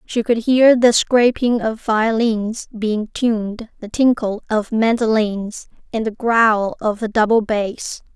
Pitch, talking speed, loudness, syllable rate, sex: 220 Hz, 145 wpm, -17 LUFS, 3.6 syllables/s, female